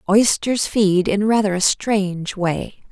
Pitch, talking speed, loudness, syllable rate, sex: 200 Hz, 145 wpm, -18 LUFS, 3.9 syllables/s, female